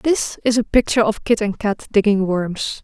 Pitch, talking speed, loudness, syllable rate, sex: 210 Hz, 210 wpm, -18 LUFS, 4.8 syllables/s, female